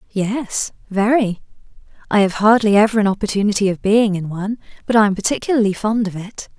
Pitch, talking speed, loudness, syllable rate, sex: 210 Hz, 175 wpm, -17 LUFS, 6.0 syllables/s, female